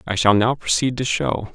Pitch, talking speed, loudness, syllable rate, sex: 115 Hz, 230 wpm, -19 LUFS, 5.0 syllables/s, male